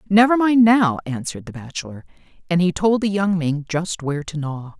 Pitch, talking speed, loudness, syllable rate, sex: 175 Hz, 200 wpm, -19 LUFS, 5.4 syllables/s, female